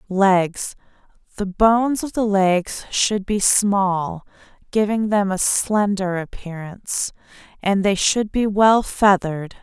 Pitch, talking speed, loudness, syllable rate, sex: 200 Hz, 120 wpm, -19 LUFS, 3.6 syllables/s, female